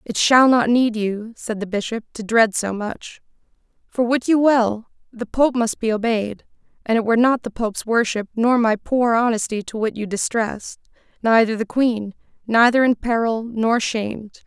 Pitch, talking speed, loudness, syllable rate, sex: 225 Hz, 180 wpm, -19 LUFS, 4.7 syllables/s, female